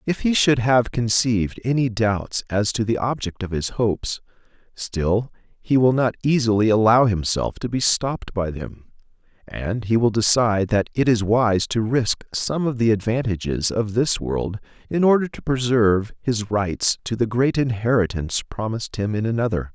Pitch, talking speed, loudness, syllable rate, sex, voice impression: 115 Hz, 175 wpm, -21 LUFS, 4.7 syllables/s, male, masculine, adult-like, slightly thick, slightly cool, sincere, slightly wild